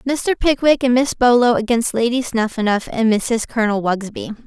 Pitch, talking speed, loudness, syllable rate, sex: 235 Hz, 160 wpm, -17 LUFS, 5.1 syllables/s, female